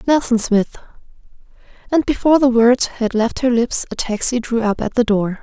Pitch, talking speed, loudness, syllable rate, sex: 240 Hz, 190 wpm, -17 LUFS, 5.2 syllables/s, female